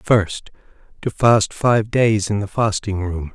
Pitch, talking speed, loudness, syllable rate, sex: 105 Hz, 145 wpm, -19 LUFS, 3.6 syllables/s, male